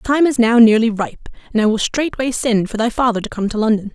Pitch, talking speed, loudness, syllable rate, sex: 230 Hz, 275 wpm, -16 LUFS, 6.1 syllables/s, female